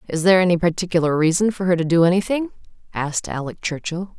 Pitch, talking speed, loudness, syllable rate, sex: 175 Hz, 185 wpm, -19 LUFS, 6.7 syllables/s, female